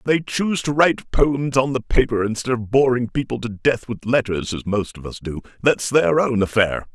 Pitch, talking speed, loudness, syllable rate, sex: 120 Hz, 225 wpm, -20 LUFS, 5.2 syllables/s, male